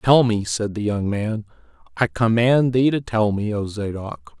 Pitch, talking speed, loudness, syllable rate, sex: 110 Hz, 190 wpm, -21 LUFS, 4.2 syllables/s, male